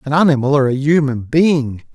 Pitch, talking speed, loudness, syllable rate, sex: 140 Hz, 185 wpm, -15 LUFS, 5.0 syllables/s, male